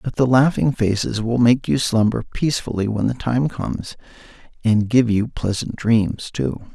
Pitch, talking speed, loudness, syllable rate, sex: 115 Hz, 170 wpm, -19 LUFS, 4.7 syllables/s, male